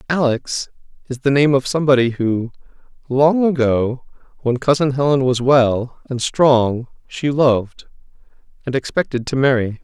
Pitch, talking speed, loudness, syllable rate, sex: 130 Hz, 135 wpm, -17 LUFS, 4.5 syllables/s, male